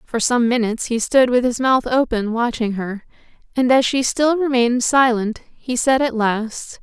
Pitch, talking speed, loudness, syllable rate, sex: 245 Hz, 185 wpm, -18 LUFS, 4.5 syllables/s, female